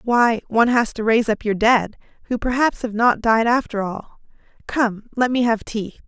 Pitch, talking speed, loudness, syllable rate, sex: 225 Hz, 200 wpm, -19 LUFS, 4.8 syllables/s, female